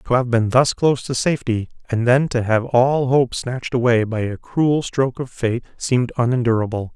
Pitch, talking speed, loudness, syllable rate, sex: 125 Hz, 200 wpm, -19 LUFS, 5.3 syllables/s, male